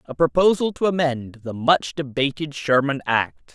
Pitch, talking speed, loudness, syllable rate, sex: 140 Hz, 150 wpm, -21 LUFS, 4.4 syllables/s, male